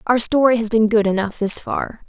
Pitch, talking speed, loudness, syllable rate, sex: 220 Hz, 230 wpm, -17 LUFS, 5.2 syllables/s, female